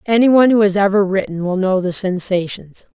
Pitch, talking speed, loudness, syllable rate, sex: 195 Hz, 185 wpm, -15 LUFS, 5.4 syllables/s, female